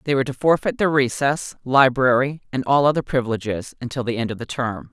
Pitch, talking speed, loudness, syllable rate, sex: 130 Hz, 205 wpm, -20 LUFS, 6.0 syllables/s, female